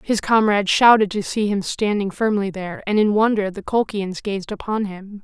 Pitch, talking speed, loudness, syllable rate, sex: 205 Hz, 195 wpm, -19 LUFS, 5.1 syllables/s, female